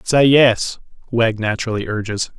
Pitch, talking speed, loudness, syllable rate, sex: 115 Hz, 125 wpm, -17 LUFS, 4.6 syllables/s, male